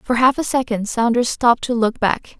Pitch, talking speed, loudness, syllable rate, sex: 240 Hz, 225 wpm, -18 LUFS, 5.1 syllables/s, female